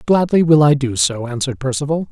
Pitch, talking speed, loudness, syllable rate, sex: 145 Hz, 200 wpm, -16 LUFS, 6.1 syllables/s, male